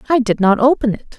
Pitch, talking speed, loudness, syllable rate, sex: 235 Hz, 255 wpm, -15 LUFS, 6.1 syllables/s, female